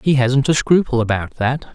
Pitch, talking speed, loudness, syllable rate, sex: 130 Hz, 205 wpm, -17 LUFS, 4.9 syllables/s, male